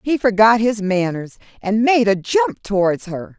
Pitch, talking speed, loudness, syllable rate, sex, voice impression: 210 Hz, 175 wpm, -17 LUFS, 4.4 syllables/s, female, feminine, middle-aged, tensed, powerful, slightly halting, slightly raspy, intellectual, slightly friendly, unique, slightly wild, lively, strict, intense